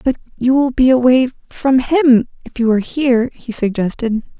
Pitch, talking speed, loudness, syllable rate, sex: 250 Hz, 150 wpm, -15 LUFS, 4.8 syllables/s, female